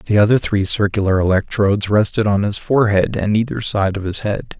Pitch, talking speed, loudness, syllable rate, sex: 105 Hz, 195 wpm, -17 LUFS, 5.5 syllables/s, male